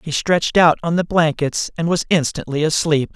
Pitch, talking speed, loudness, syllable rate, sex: 160 Hz, 190 wpm, -17 LUFS, 5.2 syllables/s, male